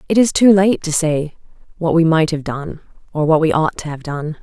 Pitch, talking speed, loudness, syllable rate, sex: 160 Hz, 245 wpm, -16 LUFS, 5.2 syllables/s, female